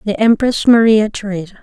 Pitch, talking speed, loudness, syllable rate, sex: 215 Hz, 145 wpm, -13 LUFS, 5.4 syllables/s, female